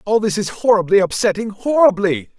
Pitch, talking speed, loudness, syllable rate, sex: 215 Hz, 150 wpm, -16 LUFS, 5.5 syllables/s, male